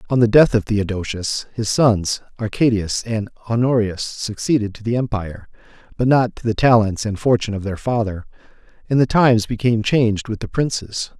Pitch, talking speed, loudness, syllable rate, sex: 110 Hz, 170 wpm, -19 LUFS, 5.4 syllables/s, male